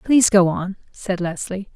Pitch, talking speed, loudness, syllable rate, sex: 195 Hz, 170 wpm, -19 LUFS, 4.7 syllables/s, female